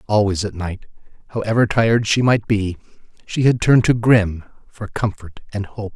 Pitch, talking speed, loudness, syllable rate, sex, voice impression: 105 Hz, 170 wpm, -18 LUFS, 5.1 syllables/s, male, masculine, adult-like, slightly fluent, cool, slightly intellectual, slightly sweet, slightly kind